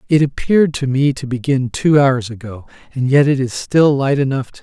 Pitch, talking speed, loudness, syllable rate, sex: 135 Hz, 235 wpm, -15 LUFS, 5.5 syllables/s, male